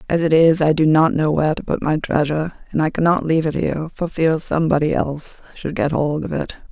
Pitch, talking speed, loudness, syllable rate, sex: 155 Hz, 240 wpm, -18 LUFS, 6.2 syllables/s, female